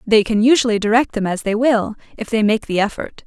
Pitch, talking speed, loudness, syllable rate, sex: 220 Hz, 240 wpm, -17 LUFS, 5.8 syllables/s, female